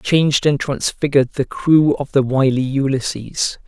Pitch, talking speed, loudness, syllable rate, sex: 135 Hz, 145 wpm, -17 LUFS, 4.2 syllables/s, male